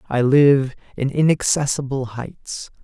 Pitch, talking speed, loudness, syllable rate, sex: 135 Hz, 105 wpm, -18 LUFS, 3.9 syllables/s, male